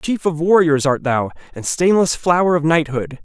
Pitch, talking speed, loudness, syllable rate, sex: 160 Hz, 185 wpm, -16 LUFS, 4.8 syllables/s, male